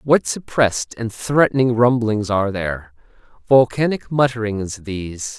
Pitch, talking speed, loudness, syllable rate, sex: 115 Hz, 110 wpm, -19 LUFS, 4.6 syllables/s, male